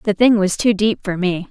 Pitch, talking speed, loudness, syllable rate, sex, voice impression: 200 Hz, 280 wpm, -17 LUFS, 5.0 syllables/s, female, very feminine, slightly young, thin, very tensed, slightly powerful, bright, slightly hard, very clear, very fluent, cute, very intellectual, refreshing, sincere, slightly calm, very friendly, reassuring, unique, very elegant, slightly wild, sweet, very lively, kind, slightly intense, slightly modest, light